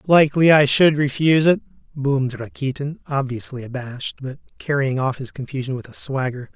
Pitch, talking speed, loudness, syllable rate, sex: 135 Hz, 155 wpm, -20 LUFS, 5.6 syllables/s, male